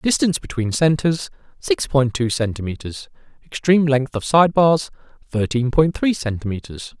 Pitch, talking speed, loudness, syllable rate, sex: 140 Hz, 135 wpm, -19 LUFS, 4.9 syllables/s, male